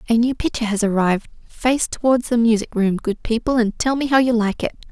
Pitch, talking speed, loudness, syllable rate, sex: 230 Hz, 230 wpm, -19 LUFS, 5.9 syllables/s, female